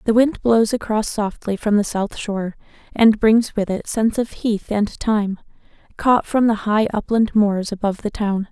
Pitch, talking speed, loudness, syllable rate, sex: 215 Hz, 190 wpm, -19 LUFS, 4.6 syllables/s, female